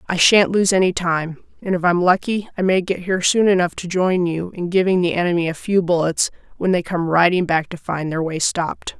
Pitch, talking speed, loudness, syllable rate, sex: 180 Hz, 235 wpm, -18 LUFS, 5.4 syllables/s, female